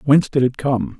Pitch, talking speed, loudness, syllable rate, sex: 125 Hz, 240 wpm, -18 LUFS, 5.8 syllables/s, male